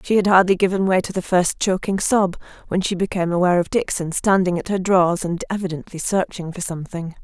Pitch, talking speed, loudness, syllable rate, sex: 185 Hz, 205 wpm, -20 LUFS, 6.1 syllables/s, female